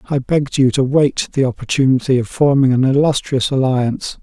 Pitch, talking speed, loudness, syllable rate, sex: 135 Hz, 170 wpm, -15 LUFS, 5.6 syllables/s, male